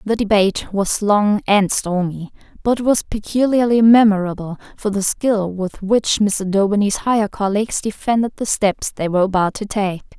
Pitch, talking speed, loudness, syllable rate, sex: 205 Hz, 160 wpm, -17 LUFS, 4.8 syllables/s, female